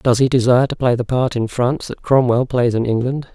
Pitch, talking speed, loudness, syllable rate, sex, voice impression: 125 Hz, 250 wpm, -17 LUFS, 5.8 syllables/s, male, masculine, adult-like, relaxed, weak, slightly dark, fluent, raspy, cool, intellectual, slightly refreshing, calm, friendly, slightly wild, kind, modest